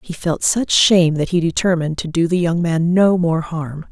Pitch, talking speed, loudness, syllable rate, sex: 170 Hz, 230 wpm, -17 LUFS, 5.0 syllables/s, female